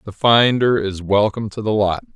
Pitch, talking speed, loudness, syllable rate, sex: 105 Hz, 195 wpm, -17 LUFS, 5.3 syllables/s, male